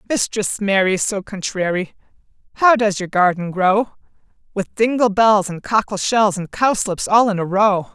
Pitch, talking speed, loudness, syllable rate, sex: 200 Hz, 160 wpm, -17 LUFS, 4.4 syllables/s, female